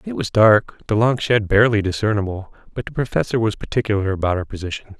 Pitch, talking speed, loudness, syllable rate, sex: 105 Hz, 190 wpm, -19 LUFS, 6.2 syllables/s, male